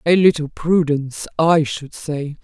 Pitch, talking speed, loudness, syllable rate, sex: 155 Hz, 150 wpm, -18 LUFS, 4.2 syllables/s, female